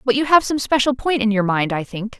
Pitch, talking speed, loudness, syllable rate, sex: 240 Hz, 300 wpm, -18 LUFS, 5.7 syllables/s, female